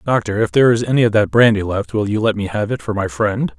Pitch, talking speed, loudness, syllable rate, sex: 105 Hz, 300 wpm, -16 LUFS, 6.3 syllables/s, male